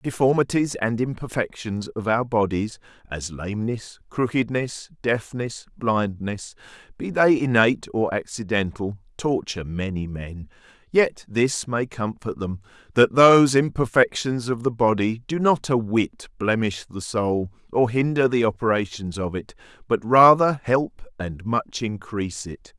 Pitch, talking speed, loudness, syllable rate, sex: 115 Hz, 130 wpm, -22 LUFS, 4.2 syllables/s, male